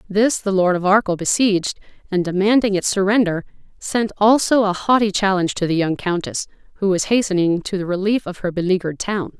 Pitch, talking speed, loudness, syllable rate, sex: 195 Hz, 185 wpm, -18 LUFS, 5.8 syllables/s, female